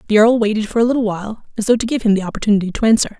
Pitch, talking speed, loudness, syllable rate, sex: 215 Hz, 300 wpm, -16 LUFS, 8.5 syllables/s, female